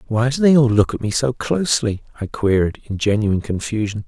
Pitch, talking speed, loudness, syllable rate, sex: 115 Hz, 205 wpm, -18 LUFS, 5.7 syllables/s, male